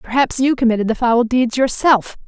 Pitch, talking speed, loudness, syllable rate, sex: 245 Hz, 185 wpm, -16 LUFS, 5.2 syllables/s, female